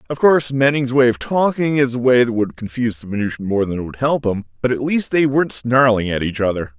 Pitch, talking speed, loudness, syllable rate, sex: 120 Hz, 255 wpm, -17 LUFS, 6.1 syllables/s, male